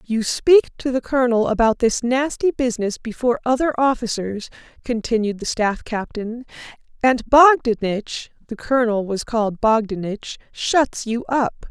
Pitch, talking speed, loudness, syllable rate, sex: 235 Hz, 135 wpm, -19 LUFS, 4.0 syllables/s, female